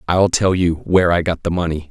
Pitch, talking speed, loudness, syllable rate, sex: 85 Hz, 250 wpm, -17 LUFS, 5.8 syllables/s, male